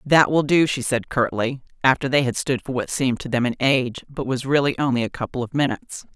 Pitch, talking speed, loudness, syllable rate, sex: 130 Hz, 245 wpm, -21 LUFS, 6.0 syllables/s, female